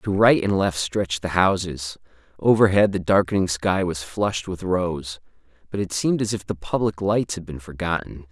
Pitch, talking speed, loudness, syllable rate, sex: 95 Hz, 190 wpm, -22 LUFS, 5.1 syllables/s, male